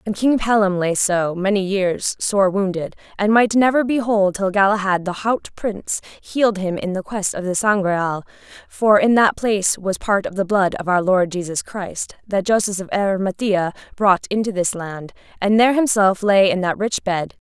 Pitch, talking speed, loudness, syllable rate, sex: 200 Hz, 195 wpm, -19 LUFS, 4.8 syllables/s, female